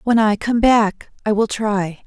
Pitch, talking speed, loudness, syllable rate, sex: 215 Hz, 175 wpm, -18 LUFS, 4.0 syllables/s, female